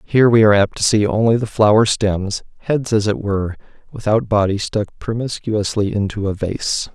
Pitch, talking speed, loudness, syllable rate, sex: 105 Hz, 180 wpm, -17 LUFS, 5.1 syllables/s, male